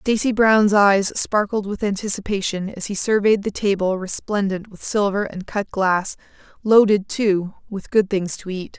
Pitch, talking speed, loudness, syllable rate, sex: 200 Hz, 155 wpm, -20 LUFS, 4.4 syllables/s, female